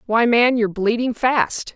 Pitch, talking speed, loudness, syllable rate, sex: 230 Hz, 170 wpm, -18 LUFS, 4.4 syllables/s, female